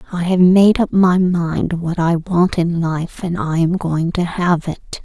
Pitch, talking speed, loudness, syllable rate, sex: 175 Hz, 215 wpm, -16 LUFS, 3.8 syllables/s, female